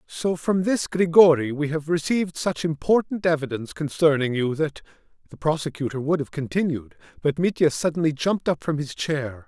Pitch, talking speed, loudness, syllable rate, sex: 155 Hz, 165 wpm, -23 LUFS, 5.4 syllables/s, male